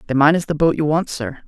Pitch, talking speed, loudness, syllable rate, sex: 150 Hz, 325 wpm, -18 LUFS, 6.3 syllables/s, male